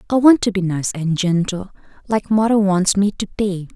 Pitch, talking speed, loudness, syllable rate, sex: 195 Hz, 210 wpm, -18 LUFS, 4.9 syllables/s, female